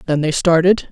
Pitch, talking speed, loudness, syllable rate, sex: 165 Hz, 195 wpm, -15 LUFS, 5.3 syllables/s, female